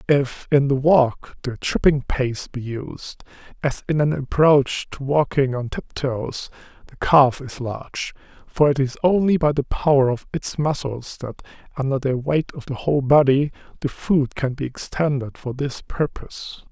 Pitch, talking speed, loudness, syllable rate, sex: 135 Hz, 170 wpm, -21 LUFS, 4.3 syllables/s, male